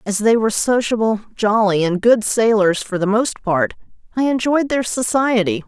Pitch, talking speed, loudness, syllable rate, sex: 220 Hz, 170 wpm, -17 LUFS, 4.8 syllables/s, female